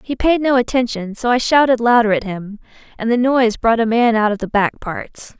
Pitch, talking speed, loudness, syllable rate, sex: 230 Hz, 235 wpm, -16 LUFS, 5.4 syllables/s, female